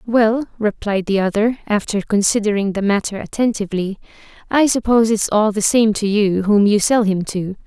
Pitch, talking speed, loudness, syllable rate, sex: 210 Hz, 170 wpm, -17 LUFS, 5.2 syllables/s, female